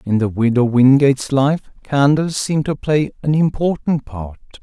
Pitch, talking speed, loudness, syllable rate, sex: 140 Hz, 155 wpm, -16 LUFS, 4.5 syllables/s, male